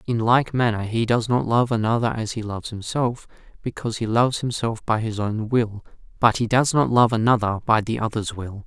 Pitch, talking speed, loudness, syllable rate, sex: 115 Hz, 210 wpm, -22 LUFS, 5.4 syllables/s, male